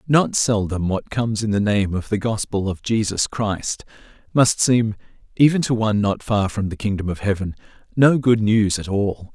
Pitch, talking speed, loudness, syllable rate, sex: 105 Hz, 195 wpm, -20 LUFS, 4.8 syllables/s, male